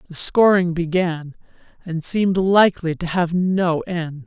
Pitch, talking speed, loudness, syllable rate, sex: 175 Hz, 140 wpm, -19 LUFS, 4.2 syllables/s, female